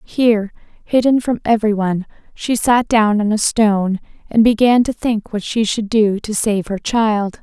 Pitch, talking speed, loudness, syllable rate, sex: 220 Hz, 180 wpm, -16 LUFS, 4.5 syllables/s, female